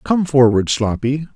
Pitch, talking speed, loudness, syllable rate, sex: 135 Hz, 135 wpm, -16 LUFS, 4.2 syllables/s, male